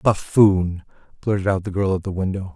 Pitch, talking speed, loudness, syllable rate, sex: 95 Hz, 190 wpm, -20 LUFS, 5.2 syllables/s, male